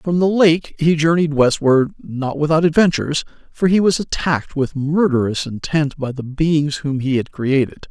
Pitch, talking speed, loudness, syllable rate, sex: 150 Hz, 175 wpm, -17 LUFS, 4.8 syllables/s, male